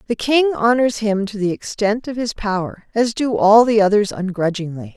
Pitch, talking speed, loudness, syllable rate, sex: 210 Hz, 195 wpm, -17 LUFS, 4.9 syllables/s, female